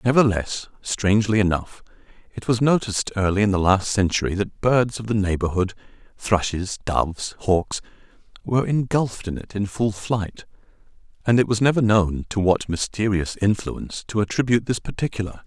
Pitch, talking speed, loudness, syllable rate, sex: 105 Hz, 145 wpm, -22 LUFS, 5.3 syllables/s, male